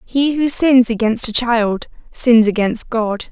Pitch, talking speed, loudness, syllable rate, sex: 235 Hz, 165 wpm, -15 LUFS, 3.7 syllables/s, female